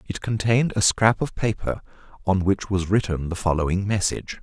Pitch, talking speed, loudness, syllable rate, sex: 100 Hz, 175 wpm, -23 LUFS, 5.4 syllables/s, male